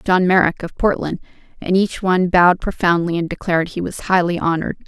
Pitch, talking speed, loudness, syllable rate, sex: 180 Hz, 185 wpm, -17 LUFS, 6.0 syllables/s, female